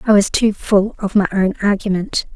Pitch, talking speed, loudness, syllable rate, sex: 200 Hz, 205 wpm, -17 LUFS, 4.9 syllables/s, female